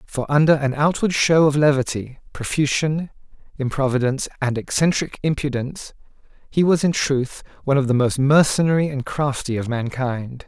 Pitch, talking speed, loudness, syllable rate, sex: 140 Hz, 145 wpm, -20 LUFS, 5.3 syllables/s, male